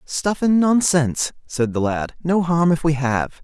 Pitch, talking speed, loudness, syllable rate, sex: 155 Hz, 190 wpm, -19 LUFS, 4.3 syllables/s, male